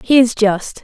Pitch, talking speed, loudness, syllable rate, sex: 225 Hz, 215 wpm, -14 LUFS, 4.1 syllables/s, female